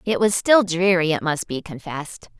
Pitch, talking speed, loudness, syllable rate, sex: 175 Hz, 200 wpm, -20 LUFS, 5.0 syllables/s, female